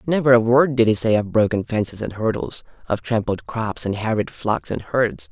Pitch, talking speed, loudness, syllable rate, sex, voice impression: 110 Hz, 215 wpm, -20 LUFS, 5.1 syllables/s, male, slightly masculine, adult-like, slightly refreshing, slightly friendly, slightly unique